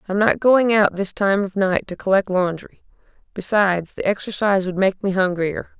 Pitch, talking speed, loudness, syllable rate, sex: 195 Hz, 185 wpm, -19 LUFS, 5.2 syllables/s, female